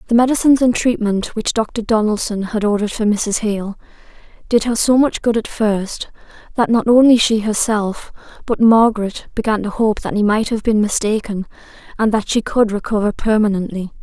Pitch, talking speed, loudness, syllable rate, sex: 215 Hz, 175 wpm, -16 LUFS, 5.2 syllables/s, female